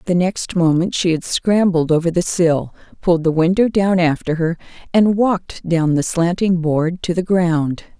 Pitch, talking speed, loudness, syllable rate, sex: 175 Hz, 180 wpm, -17 LUFS, 4.5 syllables/s, female